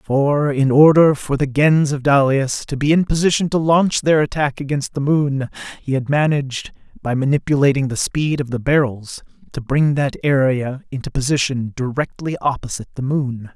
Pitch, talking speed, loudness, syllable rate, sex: 140 Hz, 175 wpm, -18 LUFS, 4.9 syllables/s, male